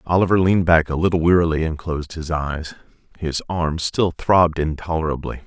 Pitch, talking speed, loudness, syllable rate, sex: 80 Hz, 165 wpm, -20 LUFS, 5.6 syllables/s, male